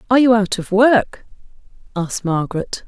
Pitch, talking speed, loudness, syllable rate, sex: 210 Hz, 145 wpm, -17 LUFS, 5.6 syllables/s, female